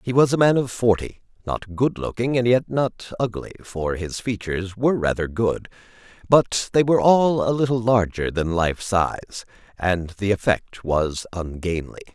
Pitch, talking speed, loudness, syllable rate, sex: 105 Hz, 165 wpm, -22 LUFS, 4.6 syllables/s, male